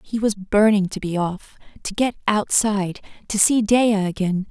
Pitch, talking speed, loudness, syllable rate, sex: 205 Hz, 175 wpm, -20 LUFS, 4.6 syllables/s, female